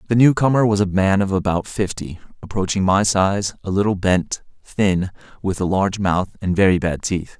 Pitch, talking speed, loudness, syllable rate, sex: 95 Hz, 195 wpm, -19 LUFS, 5.1 syllables/s, male